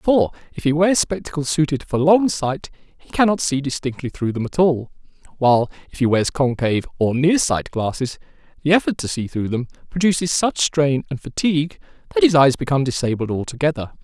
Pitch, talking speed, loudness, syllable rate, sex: 145 Hz, 185 wpm, -19 LUFS, 5.5 syllables/s, male